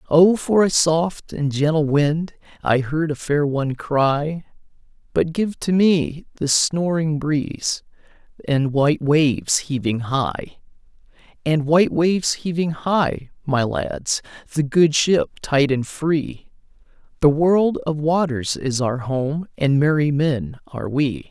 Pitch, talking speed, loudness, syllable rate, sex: 150 Hz, 140 wpm, -20 LUFS, 3.7 syllables/s, male